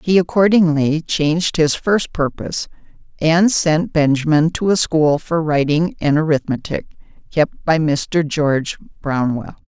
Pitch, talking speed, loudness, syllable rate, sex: 160 Hz, 130 wpm, -17 LUFS, 4.2 syllables/s, female